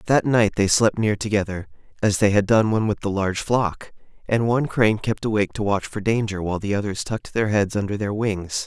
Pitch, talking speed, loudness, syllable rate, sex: 105 Hz, 230 wpm, -21 LUFS, 5.8 syllables/s, male